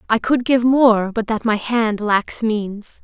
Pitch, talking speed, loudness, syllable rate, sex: 225 Hz, 200 wpm, -18 LUFS, 3.6 syllables/s, female